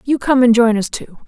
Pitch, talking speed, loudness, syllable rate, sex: 240 Hz, 280 wpm, -13 LUFS, 5.5 syllables/s, female